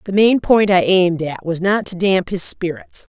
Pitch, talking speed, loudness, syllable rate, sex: 185 Hz, 230 wpm, -16 LUFS, 4.8 syllables/s, female